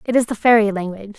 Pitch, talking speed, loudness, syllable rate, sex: 215 Hz, 255 wpm, -17 LUFS, 7.5 syllables/s, female